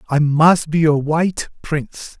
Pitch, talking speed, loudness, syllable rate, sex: 155 Hz, 165 wpm, -16 LUFS, 4.2 syllables/s, male